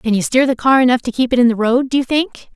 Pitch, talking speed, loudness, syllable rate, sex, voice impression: 250 Hz, 355 wpm, -15 LUFS, 6.5 syllables/s, female, very feminine, young, very thin, very tensed, powerful, very bright, very hard, very clear, fluent, slightly cute, cool, very intellectual, refreshing, sincere, very calm, friendly, reassuring, very unique, wild, sweet, slightly lively, kind, slightly intense, slightly sharp, modest